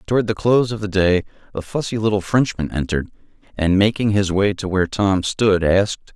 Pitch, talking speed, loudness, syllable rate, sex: 100 Hz, 195 wpm, -19 LUFS, 5.7 syllables/s, male